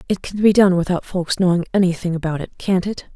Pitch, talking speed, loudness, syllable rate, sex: 180 Hz, 230 wpm, -18 LUFS, 6.0 syllables/s, female